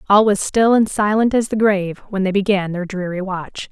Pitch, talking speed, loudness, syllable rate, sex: 200 Hz, 225 wpm, -18 LUFS, 5.2 syllables/s, female